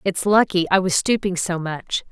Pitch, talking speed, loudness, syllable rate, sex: 185 Hz, 200 wpm, -20 LUFS, 4.7 syllables/s, female